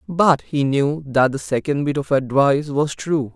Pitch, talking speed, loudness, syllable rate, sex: 145 Hz, 195 wpm, -19 LUFS, 4.5 syllables/s, male